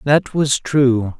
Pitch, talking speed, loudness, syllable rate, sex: 135 Hz, 150 wpm, -16 LUFS, 2.8 syllables/s, male